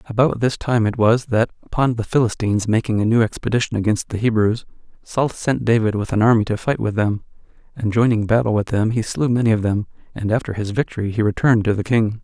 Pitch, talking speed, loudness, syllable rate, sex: 110 Hz, 220 wpm, -19 LUFS, 6.1 syllables/s, male